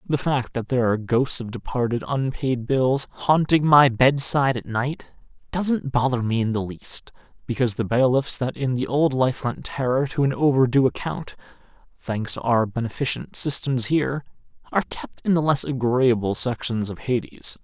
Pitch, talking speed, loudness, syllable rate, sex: 125 Hz, 170 wpm, -22 LUFS, 4.9 syllables/s, male